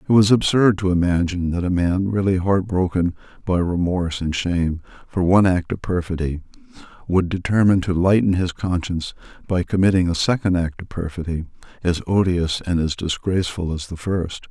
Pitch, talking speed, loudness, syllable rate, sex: 90 Hz, 165 wpm, -20 LUFS, 5.5 syllables/s, male